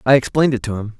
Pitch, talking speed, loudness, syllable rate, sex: 125 Hz, 300 wpm, -17 LUFS, 8.2 syllables/s, male